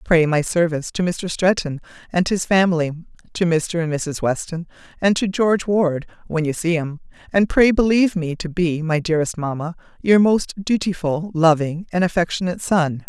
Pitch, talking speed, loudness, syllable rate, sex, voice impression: 170 Hz, 175 wpm, -19 LUFS, 5.2 syllables/s, female, feminine, adult-like, slightly thick, tensed, hard, intellectual, slightly sincere, unique, elegant, lively, slightly sharp